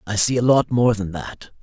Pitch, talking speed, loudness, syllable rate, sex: 110 Hz, 260 wpm, -19 LUFS, 4.9 syllables/s, male